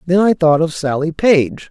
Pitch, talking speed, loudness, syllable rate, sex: 165 Hz, 210 wpm, -14 LUFS, 4.4 syllables/s, male